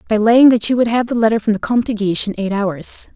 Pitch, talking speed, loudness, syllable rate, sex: 220 Hz, 305 wpm, -15 LUFS, 6.6 syllables/s, female